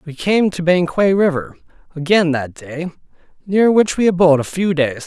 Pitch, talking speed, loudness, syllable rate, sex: 170 Hz, 180 wpm, -16 LUFS, 4.9 syllables/s, male